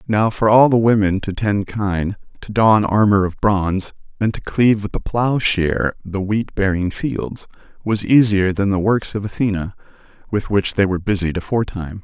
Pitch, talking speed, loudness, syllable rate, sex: 100 Hz, 185 wpm, -18 LUFS, 5.0 syllables/s, male